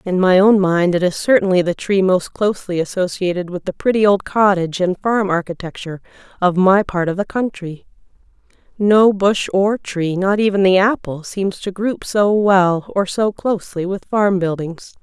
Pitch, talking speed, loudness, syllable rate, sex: 190 Hz, 180 wpm, -17 LUFS, 4.8 syllables/s, female